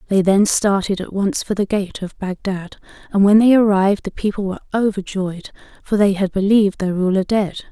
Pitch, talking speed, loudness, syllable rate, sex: 200 Hz, 195 wpm, -18 LUFS, 5.4 syllables/s, female